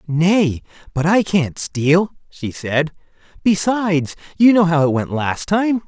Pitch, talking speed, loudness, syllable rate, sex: 170 Hz, 155 wpm, -17 LUFS, 3.8 syllables/s, male